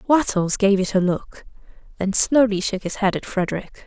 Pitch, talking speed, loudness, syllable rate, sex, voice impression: 200 Hz, 185 wpm, -20 LUFS, 5.0 syllables/s, female, feminine, adult-like, relaxed, bright, soft, raspy, intellectual, calm, friendly, reassuring, elegant, kind, modest